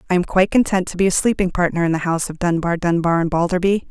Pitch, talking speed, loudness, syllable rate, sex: 175 Hz, 260 wpm, -18 LUFS, 7.1 syllables/s, female